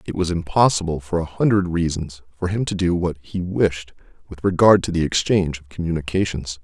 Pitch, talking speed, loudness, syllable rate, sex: 85 Hz, 190 wpm, -20 LUFS, 5.5 syllables/s, male